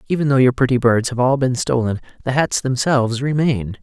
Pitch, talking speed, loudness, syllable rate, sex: 125 Hz, 205 wpm, -18 LUFS, 5.6 syllables/s, male